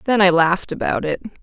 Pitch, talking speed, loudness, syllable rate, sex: 185 Hz, 210 wpm, -18 LUFS, 6.4 syllables/s, female